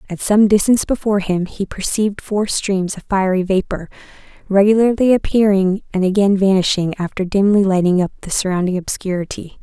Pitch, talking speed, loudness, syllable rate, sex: 195 Hz, 150 wpm, -16 LUFS, 5.6 syllables/s, female